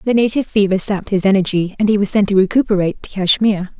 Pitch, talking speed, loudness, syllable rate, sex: 200 Hz, 220 wpm, -15 LUFS, 7.1 syllables/s, female